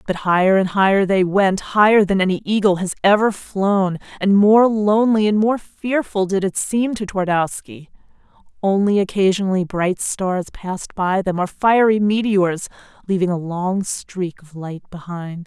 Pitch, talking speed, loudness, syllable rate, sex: 190 Hz, 150 wpm, -18 LUFS, 4.5 syllables/s, female